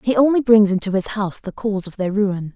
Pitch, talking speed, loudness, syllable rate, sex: 205 Hz, 260 wpm, -18 LUFS, 6.1 syllables/s, female